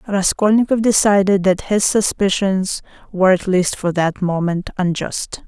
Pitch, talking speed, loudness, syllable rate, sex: 195 Hz, 130 wpm, -17 LUFS, 4.5 syllables/s, female